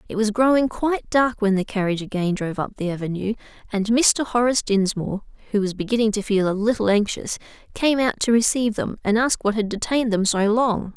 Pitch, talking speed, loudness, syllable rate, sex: 215 Hz, 210 wpm, -21 LUFS, 6.0 syllables/s, female